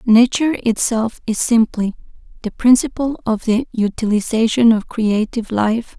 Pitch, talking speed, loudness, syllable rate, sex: 225 Hz, 120 wpm, -17 LUFS, 4.5 syllables/s, female